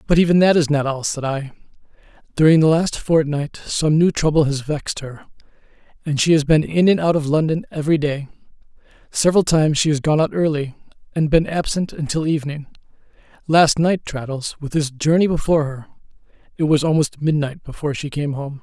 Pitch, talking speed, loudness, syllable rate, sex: 150 Hz, 185 wpm, -18 LUFS, 5.7 syllables/s, male